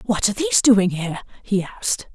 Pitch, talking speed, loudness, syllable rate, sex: 205 Hz, 195 wpm, -20 LUFS, 6.7 syllables/s, female